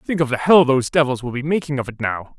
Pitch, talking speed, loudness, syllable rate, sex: 135 Hz, 300 wpm, -18 LUFS, 6.7 syllables/s, male